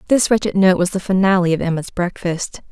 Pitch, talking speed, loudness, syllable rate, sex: 185 Hz, 200 wpm, -17 LUFS, 5.7 syllables/s, female